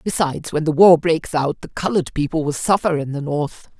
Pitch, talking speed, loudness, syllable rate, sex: 160 Hz, 220 wpm, -19 LUFS, 5.5 syllables/s, female